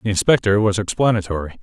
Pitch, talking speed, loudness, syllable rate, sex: 100 Hz, 150 wpm, -18 LUFS, 6.6 syllables/s, male